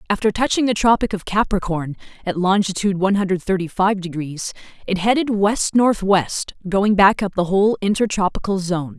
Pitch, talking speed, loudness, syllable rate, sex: 195 Hz, 160 wpm, -19 LUFS, 5.4 syllables/s, female